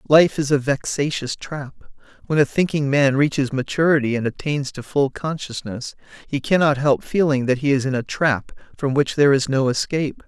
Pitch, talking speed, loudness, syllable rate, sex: 140 Hz, 185 wpm, -20 LUFS, 5.2 syllables/s, male